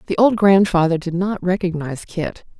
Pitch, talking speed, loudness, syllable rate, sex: 180 Hz, 160 wpm, -18 LUFS, 5.4 syllables/s, female